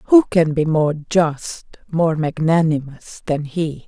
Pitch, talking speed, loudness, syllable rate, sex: 160 Hz, 140 wpm, -18 LUFS, 3.4 syllables/s, female